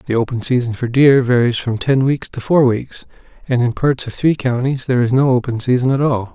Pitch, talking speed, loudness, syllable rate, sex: 125 Hz, 235 wpm, -16 LUFS, 5.6 syllables/s, male